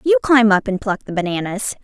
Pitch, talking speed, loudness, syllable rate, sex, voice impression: 220 Hz, 230 wpm, -17 LUFS, 5.4 syllables/s, female, feminine, adult-like, tensed, powerful, bright, slightly soft, slightly raspy, intellectual, friendly, elegant, lively